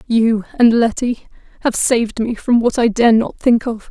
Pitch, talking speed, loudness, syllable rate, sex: 230 Hz, 200 wpm, -15 LUFS, 4.6 syllables/s, female